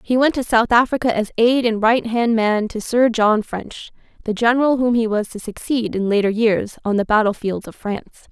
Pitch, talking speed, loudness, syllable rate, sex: 225 Hz, 200 wpm, -18 LUFS, 5.2 syllables/s, female